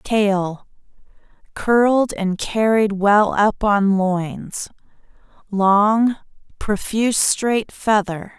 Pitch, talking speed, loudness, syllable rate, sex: 205 Hz, 80 wpm, -18 LUFS, 2.7 syllables/s, female